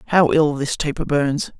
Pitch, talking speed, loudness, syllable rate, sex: 150 Hz, 190 wpm, -19 LUFS, 4.6 syllables/s, male